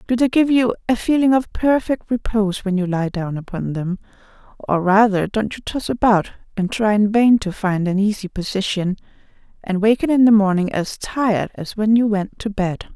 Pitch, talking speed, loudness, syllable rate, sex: 210 Hz, 200 wpm, -18 LUFS, 5.0 syllables/s, female